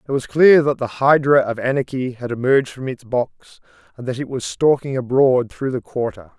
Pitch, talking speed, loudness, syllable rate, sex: 130 Hz, 205 wpm, -18 LUFS, 5.2 syllables/s, male